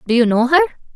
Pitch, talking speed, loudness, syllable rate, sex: 270 Hz, 255 wpm, -15 LUFS, 8.5 syllables/s, female